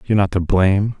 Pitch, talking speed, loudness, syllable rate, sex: 100 Hz, 240 wpm, -17 LUFS, 6.7 syllables/s, male